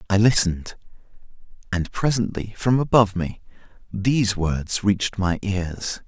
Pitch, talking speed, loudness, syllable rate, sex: 100 Hz, 120 wpm, -22 LUFS, 4.6 syllables/s, male